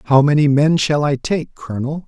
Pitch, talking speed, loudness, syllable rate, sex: 145 Hz, 205 wpm, -16 LUFS, 5.4 syllables/s, male